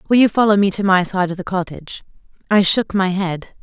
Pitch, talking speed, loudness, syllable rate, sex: 190 Hz, 230 wpm, -17 LUFS, 5.8 syllables/s, female